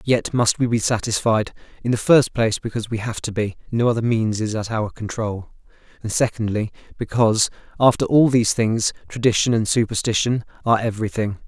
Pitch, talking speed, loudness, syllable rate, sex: 110 Hz, 150 wpm, -20 LUFS, 5.8 syllables/s, male